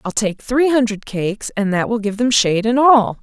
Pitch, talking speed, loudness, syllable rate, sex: 225 Hz, 240 wpm, -17 LUFS, 5.1 syllables/s, female